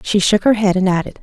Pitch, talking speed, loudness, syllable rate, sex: 195 Hz, 295 wpm, -15 LUFS, 6.2 syllables/s, female